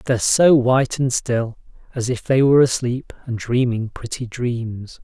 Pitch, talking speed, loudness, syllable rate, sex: 125 Hz, 165 wpm, -19 LUFS, 4.6 syllables/s, male